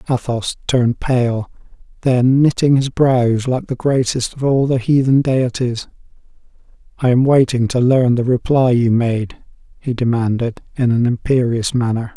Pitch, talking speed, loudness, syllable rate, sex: 125 Hz, 145 wpm, -16 LUFS, 4.4 syllables/s, male